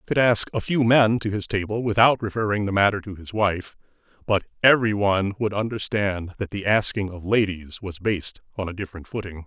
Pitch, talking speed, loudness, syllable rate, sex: 100 Hz, 205 wpm, -23 LUFS, 5.8 syllables/s, male